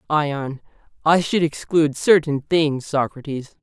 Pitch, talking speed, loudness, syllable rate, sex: 150 Hz, 115 wpm, -20 LUFS, 4.0 syllables/s, male